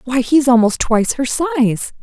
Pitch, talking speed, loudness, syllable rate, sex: 250 Hz, 180 wpm, -15 LUFS, 5.8 syllables/s, female